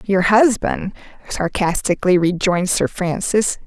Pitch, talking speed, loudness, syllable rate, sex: 190 Hz, 100 wpm, -17 LUFS, 4.4 syllables/s, female